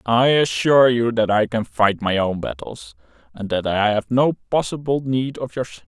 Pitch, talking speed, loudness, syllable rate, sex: 120 Hz, 200 wpm, -19 LUFS, 5.1 syllables/s, male